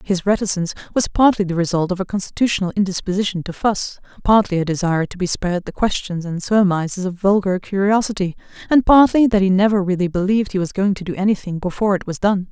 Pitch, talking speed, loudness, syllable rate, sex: 195 Hz, 200 wpm, -18 LUFS, 6.5 syllables/s, female